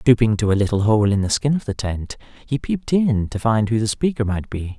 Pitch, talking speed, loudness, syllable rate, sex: 115 Hz, 265 wpm, -20 LUFS, 5.5 syllables/s, male